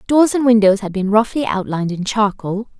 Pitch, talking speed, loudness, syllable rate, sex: 215 Hz, 195 wpm, -16 LUFS, 5.4 syllables/s, female